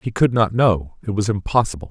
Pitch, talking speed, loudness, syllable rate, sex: 105 Hz, 220 wpm, -19 LUFS, 5.7 syllables/s, male